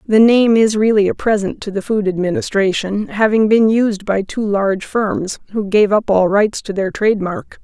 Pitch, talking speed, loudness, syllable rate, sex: 205 Hz, 205 wpm, -15 LUFS, 4.7 syllables/s, female